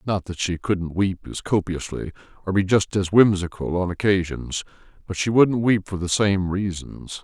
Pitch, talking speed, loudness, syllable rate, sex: 95 Hz, 180 wpm, -22 LUFS, 4.7 syllables/s, male